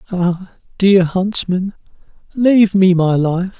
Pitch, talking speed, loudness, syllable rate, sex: 190 Hz, 115 wpm, -14 LUFS, 3.6 syllables/s, male